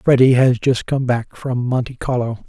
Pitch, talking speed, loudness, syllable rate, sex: 125 Hz, 195 wpm, -18 LUFS, 4.8 syllables/s, male